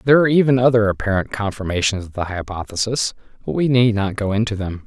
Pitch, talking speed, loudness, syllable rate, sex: 105 Hz, 195 wpm, -19 LUFS, 6.5 syllables/s, male